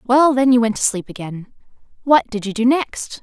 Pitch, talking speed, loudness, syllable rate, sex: 235 Hz, 225 wpm, -17 LUFS, 4.9 syllables/s, female